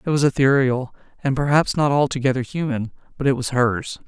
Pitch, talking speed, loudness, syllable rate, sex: 135 Hz, 175 wpm, -20 LUFS, 5.6 syllables/s, female